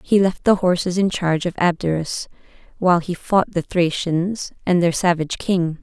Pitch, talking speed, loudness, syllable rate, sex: 175 Hz, 175 wpm, -20 LUFS, 4.9 syllables/s, female